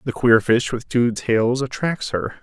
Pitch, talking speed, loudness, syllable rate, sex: 120 Hz, 200 wpm, -19 LUFS, 4.0 syllables/s, male